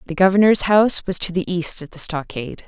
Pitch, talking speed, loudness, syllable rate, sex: 180 Hz, 225 wpm, -18 LUFS, 6.2 syllables/s, female